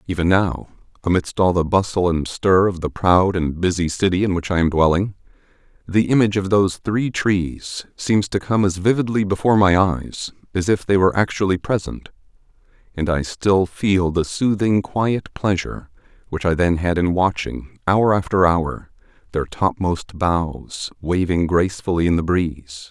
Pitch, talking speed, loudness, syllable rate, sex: 90 Hz, 170 wpm, -19 LUFS, 4.7 syllables/s, male